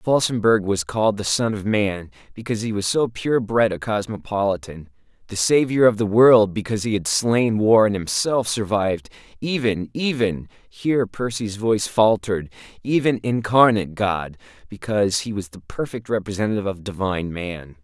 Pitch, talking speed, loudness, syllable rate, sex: 105 Hz, 140 wpm, -21 LUFS, 5.1 syllables/s, male